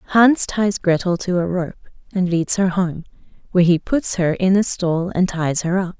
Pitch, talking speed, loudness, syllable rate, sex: 180 Hz, 210 wpm, -19 LUFS, 4.7 syllables/s, female